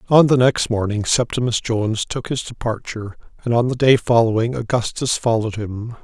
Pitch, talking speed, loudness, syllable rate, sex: 115 Hz, 170 wpm, -19 LUFS, 5.4 syllables/s, male